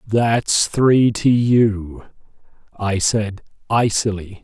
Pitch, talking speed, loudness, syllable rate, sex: 110 Hz, 95 wpm, -17 LUFS, 2.7 syllables/s, male